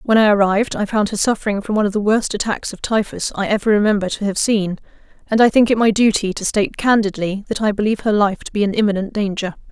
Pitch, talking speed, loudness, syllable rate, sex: 210 Hz, 245 wpm, -17 LUFS, 6.6 syllables/s, female